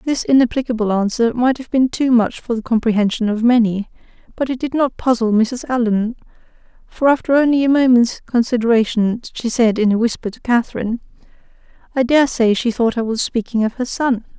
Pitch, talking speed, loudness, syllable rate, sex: 240 Hz, 185 wpm, -17 LUFS, 5.6 syllables/s, female